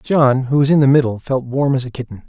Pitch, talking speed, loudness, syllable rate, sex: 135 Hz, 290 wpm, -15 LUFS, 5.9 syllables/s, male